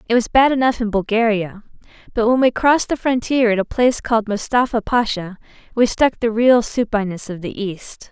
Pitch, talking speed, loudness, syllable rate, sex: 225 Hz, 190 wpm, -18 LUFS, 5.5 syllables/s, female